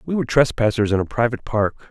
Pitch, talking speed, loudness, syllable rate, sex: 115 Hz, 220 wpm, -20 LUFS, 6.7 syllables/s, male